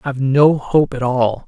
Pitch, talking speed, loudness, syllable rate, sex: 135 Hz, 245 wpm, -15 LUFS, 4.4 syllables/s, male